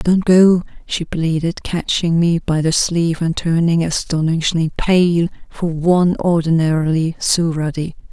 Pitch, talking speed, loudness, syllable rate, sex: 165 Hz, 135 wpm, -16 LUFS, 4.3 syllables/s, female